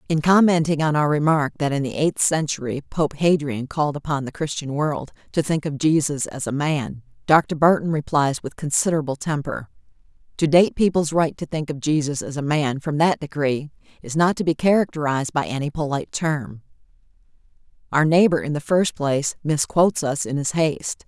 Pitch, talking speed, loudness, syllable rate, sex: 150 Hz, 180 wpm, -21 LUFS, 5.4 syllables/s, female